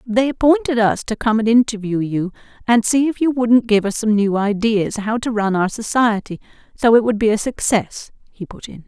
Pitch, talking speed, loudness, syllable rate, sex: 220 Hz, 215 wpm, -17 LUFS, 5.1 syllables/s, female